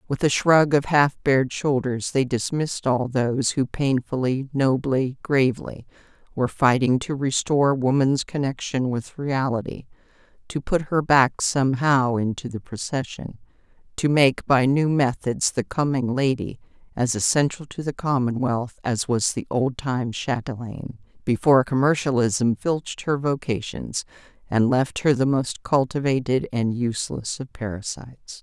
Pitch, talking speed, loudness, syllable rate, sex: 130 Hz, 135 wpm, -22 LUFS, 4.5 syllables/s, female